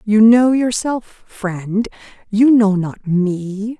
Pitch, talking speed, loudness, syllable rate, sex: 215 Hz, 125 wpm, -16 LUFS, 2.9 syllables/s, female